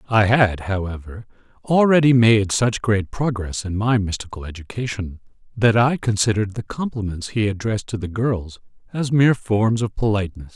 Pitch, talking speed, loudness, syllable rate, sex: 105 Hz, 155 wpm, -20 LUFS, 5.1 syllables/s, male